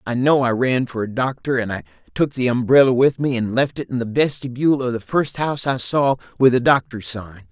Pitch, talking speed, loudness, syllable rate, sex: 125 Hz, 240 wpm, -19 LUFS, 5.5 syllables/s, male